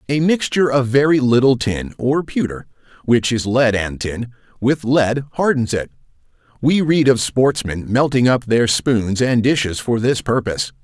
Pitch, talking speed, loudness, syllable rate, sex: 125 Hz, 165 wpm, -17 LUFS, 5.0 syllables/s, male